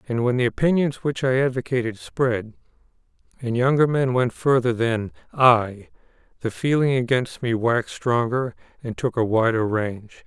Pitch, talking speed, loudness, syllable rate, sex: 125 Hz, 150 wpm, -22 LUFS, 4.8 syllables/s, male